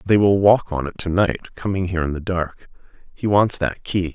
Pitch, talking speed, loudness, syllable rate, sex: 90 Hz, 215 wpm, -20 LUFS, 5.4 syllables/s, male